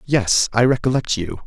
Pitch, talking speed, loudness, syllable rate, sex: 120 Hz, 165 wpm, -18 LUFS, 4.8 syllables/s, male